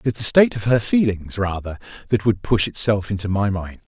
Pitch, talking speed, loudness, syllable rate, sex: 105 Hz, 230 wpm, -20 LUFS, 5.8 syllables/s, male